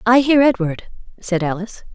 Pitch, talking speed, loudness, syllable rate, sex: 210 Hz, 155 wpm, -17 LUFS, 5.4 syllables/s, female